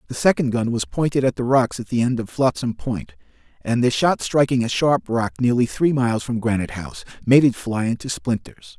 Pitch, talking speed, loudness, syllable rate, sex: 120 Hz, 220 wpm, -20 LUFS, 5.5 syllables/s, male